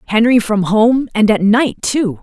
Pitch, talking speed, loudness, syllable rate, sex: 220 Hz, 190 wpm, -13 LUFS, 4.0 syllables/s, female